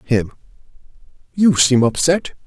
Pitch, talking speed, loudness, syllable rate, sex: 145 Hz, 95 wpm, -16 LUFS, 3.9 syllables/s, male